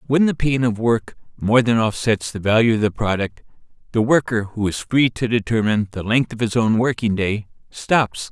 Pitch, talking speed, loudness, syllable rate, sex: 115 Hz, 200 wpm, -19 LUFS, 5.0 syllables/s, male